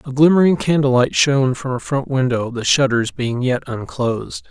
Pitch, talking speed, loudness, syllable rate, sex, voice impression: 130 Hz, 175 wpm, -17 LUFS, 5.0 syllables/s, male, very masculine, middle-aged, very thick, tensed, powerful, slightly dark, slightly soft, clear, fluent, raspy, cool, intellectual, slightly refreshing, sincere, calm, very mature, slightly friendly, slightly reassuring, slightly unique, slightly elegant, wild, slightly sweet, lively, slightly strict, slightly modest